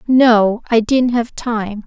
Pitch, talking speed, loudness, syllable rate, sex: 230 Hz, 160 wpm, -15 LUFS, 3.1 syllables/s, female